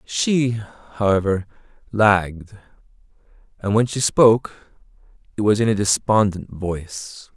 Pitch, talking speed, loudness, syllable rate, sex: 105 Hz, 105 wpm, -19 LUFS, 3.9 syllables/s, male